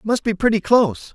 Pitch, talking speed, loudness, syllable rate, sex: 205 Hz, 210 wpm, -18 LUFS, 5.7 syllables/s, male